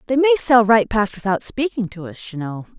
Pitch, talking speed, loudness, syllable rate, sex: 220 Hz, 235 wpm, -18 LUFS, 5.4 syllables/s, female